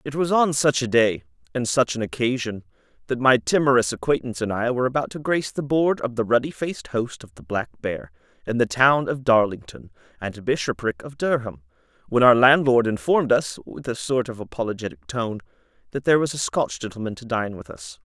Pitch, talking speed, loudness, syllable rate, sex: 125 Hz, 200 wpm, -22 LUFS, 5.7 syllables/s, male